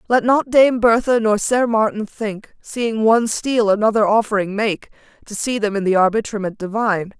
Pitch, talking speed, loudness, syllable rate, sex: 220 Hz, 175 wpm, -17 LUFS, 5.0 syllables/s, female